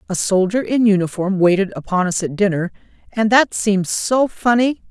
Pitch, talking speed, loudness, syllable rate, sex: 205 Hz, 170 wpm, -17 LUFS, 5.2 syllables/s, female